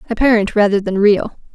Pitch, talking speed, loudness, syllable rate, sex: 210 Hz, 155 wpm, -14 LUFS, 5.7 syllables/s, female